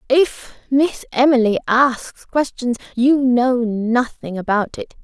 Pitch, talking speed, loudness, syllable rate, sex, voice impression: 250 Hz, 105 wpm, -18 LUFS, 3.5 syllables/s, female, feminine, young, slightly tensed, powerful, bright, soft, raspy, cute, friendly, slightly sweet, lively, slightly kind